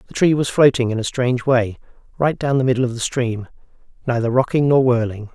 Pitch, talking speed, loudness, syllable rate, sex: 125 Hz, 215 wpm, -18 LUFS, 6.0 syllables/s, male